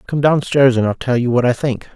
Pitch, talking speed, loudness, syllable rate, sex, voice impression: 130 Hz, 305 wpm, -16 LUFS, 5.7 syllables/s, male, masculine, middle-aged, relaxed, slightly weak, slightly muffled, nasal, intellectual, mature, friendly, wild, lively, strict